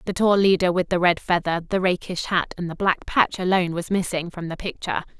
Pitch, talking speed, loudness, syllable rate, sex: 180 Hz, 230 wpm, -22 LUFS, 5.9 syllables/s, female